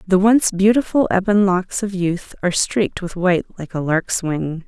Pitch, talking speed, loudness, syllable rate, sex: 190 Hz, 195 wpm, -18 LUFS, 4.8 syllables/s, female